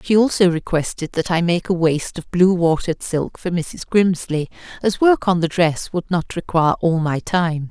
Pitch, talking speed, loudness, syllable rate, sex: 175 Hz, 200 wpm, -19 LUFS, 4.7 syllables/s, female